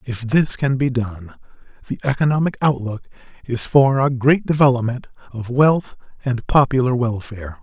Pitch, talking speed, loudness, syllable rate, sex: 130 Hz, 140 wpm, -18 LUFS, 4.8 syllables/s, male